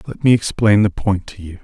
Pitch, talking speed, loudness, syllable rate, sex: 100 Hz, 255 wpm, -16 LUFS, 5.4 syllables/s, male